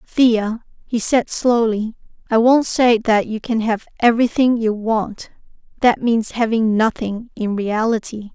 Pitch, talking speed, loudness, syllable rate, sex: 225 Hz, 135 wpm, -18 LUFS, 4.0 syllables/s, female